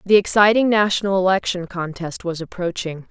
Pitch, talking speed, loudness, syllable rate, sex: 185 Hz, 135 wpm, -19 LUFS, 5.5 syllables/s, female